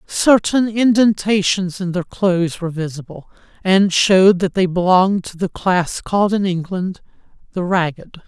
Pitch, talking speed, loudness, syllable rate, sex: 185 Hz, 145 wpm, -17 LUFS, 4.7 syllables/s, male